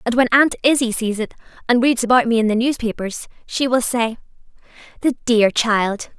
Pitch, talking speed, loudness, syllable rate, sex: 235 Hz, 185 wpm, -18 LUFS, 5.0 syllables/s, female